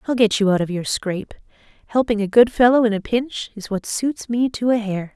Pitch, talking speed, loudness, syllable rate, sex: 220 Hz, 245 wpm, -19 LUFS, 5.4 syllables/s, female